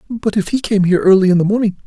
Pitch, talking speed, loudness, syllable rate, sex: 200 Hz, 290 wpm, -14 LUFS, 7.3 syllables/s, male